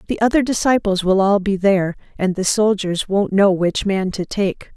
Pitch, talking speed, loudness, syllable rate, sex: 195 Hz, 200 wpm, -18 LUFS, 4.8 syllables/s, female